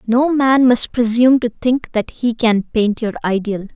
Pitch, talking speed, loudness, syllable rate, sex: 235 Hz, 190 wpm, -16 LUFS, 4.4 syllables/s, female